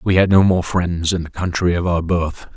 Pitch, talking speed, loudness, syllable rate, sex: 90 Hz, 260 wpm, -18 LUFS, 4.8 syllables/s, male